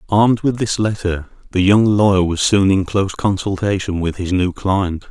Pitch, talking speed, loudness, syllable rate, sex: 95 Hz, 190 wpm, -17 LUFS, 5.2 syllables/s, male